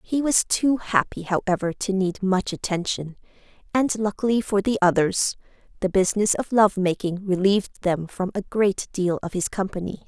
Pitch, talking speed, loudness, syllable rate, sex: 195 Hz, 165 wpm, -23 LUFS, 5.0 syllables/s, female